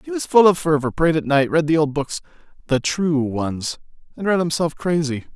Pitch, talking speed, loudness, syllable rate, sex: 155 Hz, 215 wpm, -19 LUFS, 5.1 syllables/s, male